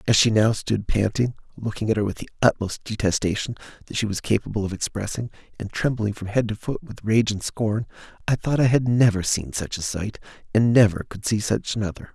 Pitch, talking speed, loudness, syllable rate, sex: 110 Hz, 210 wpm, -23 LUFS, 5.6 syllables/s, male